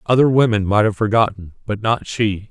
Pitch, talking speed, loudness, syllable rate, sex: 110 Hz, 190 wpm, -17 LUFS, 5.3 syllables/s, male